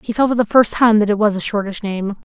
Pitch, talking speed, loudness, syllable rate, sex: 210 Hz, 305 wpm, -16 LUFS, 6.1 syllables/s, female